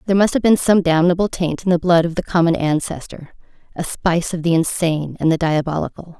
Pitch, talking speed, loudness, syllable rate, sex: 170 Hz, 205 wpm, -18 LUFS, 6.1 syllables/s, female